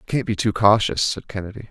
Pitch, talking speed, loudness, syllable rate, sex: 105 Hz, 245 wpm, -20 LUFS, 7.0 syllables/s, male